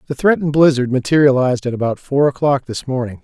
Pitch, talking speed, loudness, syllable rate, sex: 135 Hz, 185 wpm, -16 LUFS, 6.6 syllables/s, male